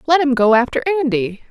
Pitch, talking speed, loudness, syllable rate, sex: 265 Hz, 200 wpm, -16 LUFS, 6.4 syllables/s, female